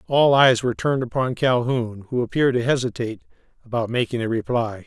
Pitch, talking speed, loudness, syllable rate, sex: 120 Hz, 175 wpm, -21 LUFS, 6.1 syllables/s, male